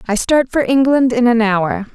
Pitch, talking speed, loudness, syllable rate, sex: 240 Hz, 215 wpm, -14 LUFS, 4.7 syllables/s, female